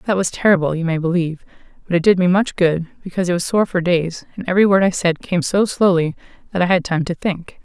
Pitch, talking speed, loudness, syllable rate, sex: 180 Hz, 250 wpm, -18 LUFS, 6.4 syllables/s, female